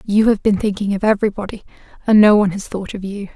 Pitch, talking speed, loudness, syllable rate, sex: 205 Hz, 230 wpm, -16 LUFS, 6.9 syllables/s, female